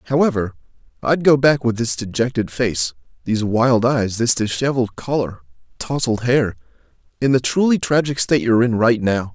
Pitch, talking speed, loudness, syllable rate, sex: 120 Hz, 155 wpm, -18 LUFS, 5.3 syllables/s, male